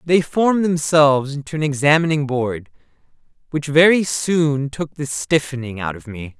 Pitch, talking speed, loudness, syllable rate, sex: 145 Hz, 150 wpm, -18 LUFS, 4.7 syllables/s, male